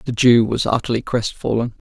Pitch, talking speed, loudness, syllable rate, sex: 115 Hz, 160 wpm, -18 LUFS, 5.2 syllables/s, male